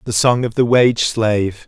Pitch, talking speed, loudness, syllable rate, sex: 110 Hz, 215 wpm, -15 LUFS, 4.6 syllables/s, male